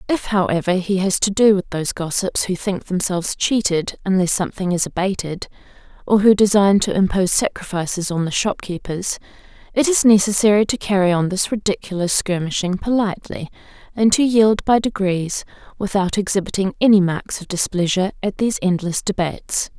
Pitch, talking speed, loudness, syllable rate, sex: 195 Hz, 155 wpm, -18 LUFS, 5.5 syllables/s, female